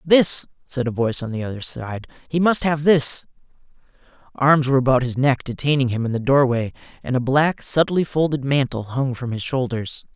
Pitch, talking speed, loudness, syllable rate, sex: 135 Hz, 190 wpm, -20 LUFS, 5.2 syllables/s, male